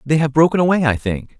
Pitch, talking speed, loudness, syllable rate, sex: 145 Hz, 255 wpm, -16 LUFS, 6.2 syllables/s, male